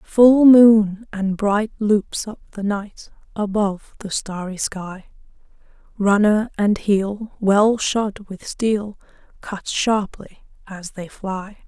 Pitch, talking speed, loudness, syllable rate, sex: 205 Hz, 125 wpm, -19 LUFS, 3.1 syllables/s, female